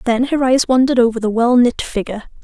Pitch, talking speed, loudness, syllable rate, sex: 240 Hz, 220 wpm, -15 LUFS, 6.6 syllables/s, female